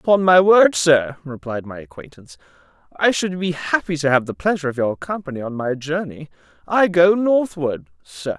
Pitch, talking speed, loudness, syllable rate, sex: 155 Hz, 170 wpm, -18 LUFS, 5.1 syllables/s, male